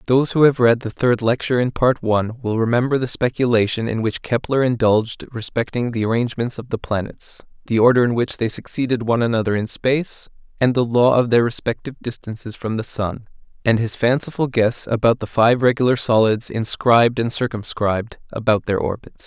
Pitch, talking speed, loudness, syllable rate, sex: 120 Hz, 185 wpm, -19 LUFS, 5.7 syllables/s, male